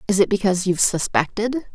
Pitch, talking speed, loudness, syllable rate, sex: 200 Hz, 170 wpm, -20 LUFS, 6.5 syllables/s, female